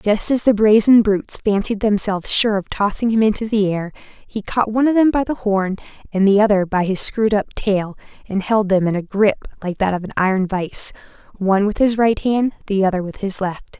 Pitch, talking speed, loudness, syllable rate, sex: 205 Hz, 225 wpm, -18 LUFS, 5.6 syllables/s, female